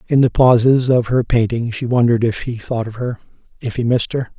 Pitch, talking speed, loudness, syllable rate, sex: 120 Hz, 230 wpm, -17 LUFS, 5.8 syllables/s, male